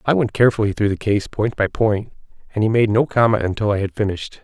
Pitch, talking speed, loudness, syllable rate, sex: 105 Hz, 245 wpm, -19 LUFS, 6.4 syllables/s, male